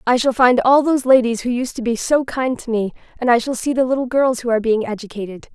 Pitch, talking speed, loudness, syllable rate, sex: 245 Hz, 270 wpm, -17 LUFS, 6.2 syllables/s, female